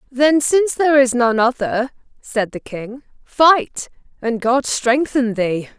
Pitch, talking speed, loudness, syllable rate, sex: 250 Hz, 145 wpm, -17 LUFS, 3.9 syllables/s, female